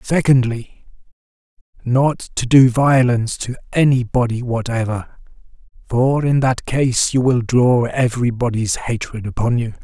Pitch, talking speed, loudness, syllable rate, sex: 125 Hz, 130 wpm, -17 LUFS, 4.3 syllables/s, male